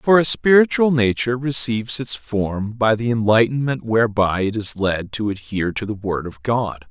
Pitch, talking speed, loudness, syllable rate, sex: 115 Hz, 180 wpm, -19 LUFS, 5.0 syllables/s, male